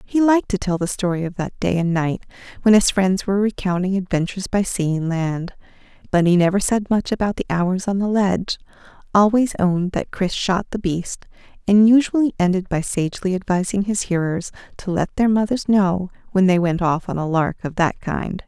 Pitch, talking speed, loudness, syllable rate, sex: 190 Hz, 200 wpm, -20 LUFS, 5.3 syllables/s, female